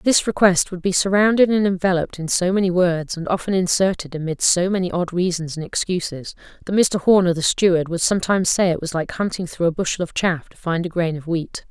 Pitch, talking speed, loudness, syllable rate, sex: 180 Hz, 225 wpm, -19 LUFS, 5.9 syllables/s, female